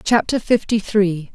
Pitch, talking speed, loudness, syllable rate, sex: 200 Hz, 135 wpm, -18 LUFS, 4.0 syllables/s, female